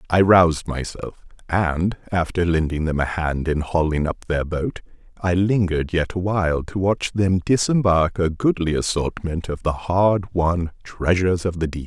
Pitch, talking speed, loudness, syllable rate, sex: 85 Hz, 165 wpm, -21 LUFS, 4.6 syllables/s, male